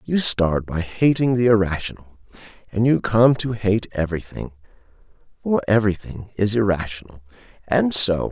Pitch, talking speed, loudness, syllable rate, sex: 105 Hz, 130 wpm, -20 LUFS, 4.9 syllables/s, male